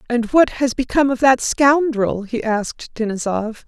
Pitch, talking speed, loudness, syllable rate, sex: 245 Hz, 165 wpm, -18 LUFS, 4.7 syllables/s, female